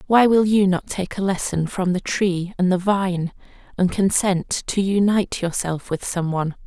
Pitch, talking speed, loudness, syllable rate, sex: 185 Hz, 190 wpm, -21 LUFS, 4.6 syllables/s, female